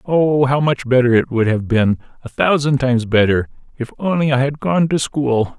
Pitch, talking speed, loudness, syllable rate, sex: 135 Hz, 205 wpm, -16 LUFS, 4.9 syllables/s, male